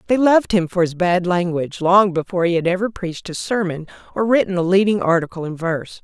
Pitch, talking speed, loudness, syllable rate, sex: 180 Hz, 220 wpm, -18 LUFS, 6.3 syllables/s, female